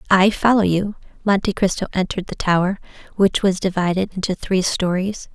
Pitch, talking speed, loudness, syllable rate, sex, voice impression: 190 Hz, 155 wpm, -19 LUFS, 5.5 syllables/s, female, very feminine, very adult-like, very middle-aged, very thin, slightly relaxed, weak, dark, very soft, very muffled, slightly fluent, very cute, very intellectual, refreshing, very sincere, very calm, very friendly, very reassuring, very unique, very elegant, very sweet, slightly lively, very kind, very modest, light